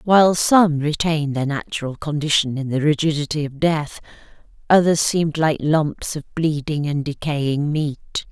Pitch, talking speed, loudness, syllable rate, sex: 150 Hz, 145 wpm, -20 LUFS, 4.6 syllables/s, female